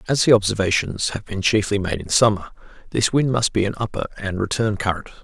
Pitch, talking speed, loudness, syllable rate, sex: 105 Hz, 205 wpm, -20 LUFS, 5.9 syllables/s, male